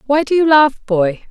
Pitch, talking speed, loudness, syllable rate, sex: 265 Hz, 230 wpm, -13 LUFS, 4.6 syllables/s, female